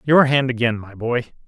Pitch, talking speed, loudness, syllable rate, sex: 125 Hz, 205 wpm, -19 LUFS, 5.4 syllables/s, male